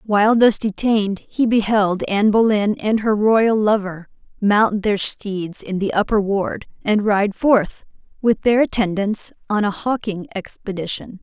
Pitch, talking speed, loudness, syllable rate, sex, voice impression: 210 Hz, 150 wpm, -18 LUFS, 4.2 syllables/s, female, feminine, adult-like, tensed, powerful, slightly clear, slightly raspy, intellectual, calm, elegant, lively, slightly strict, slightly sharp